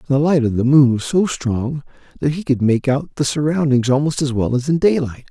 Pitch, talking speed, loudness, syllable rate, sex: 140 Hz, 235 wpm, -17 LUFS, 5.4 syllables/s, male